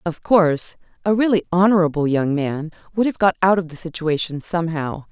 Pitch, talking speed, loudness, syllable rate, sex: 170 Hz, 175 wpm, -19 LUFS, 5.6 syllables/s, female